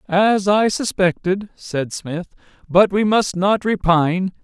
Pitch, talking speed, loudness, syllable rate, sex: 190 Hz, 135 wpm, -18 LUFS, 3.8 syllables/s, male